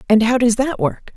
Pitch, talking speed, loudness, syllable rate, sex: 230 Hz, 260 wpm, -17 LUFS, 5.2 syllables/s, female